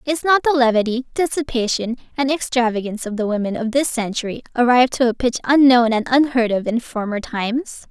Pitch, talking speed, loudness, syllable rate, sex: 245 Hz, 180 wpm, -18 LUFS, 5.9 syllables/s, female